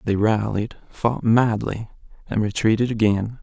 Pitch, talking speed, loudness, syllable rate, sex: 110 Hz, 125 wpm, -21 LUFS, 4.3 syllables/s, male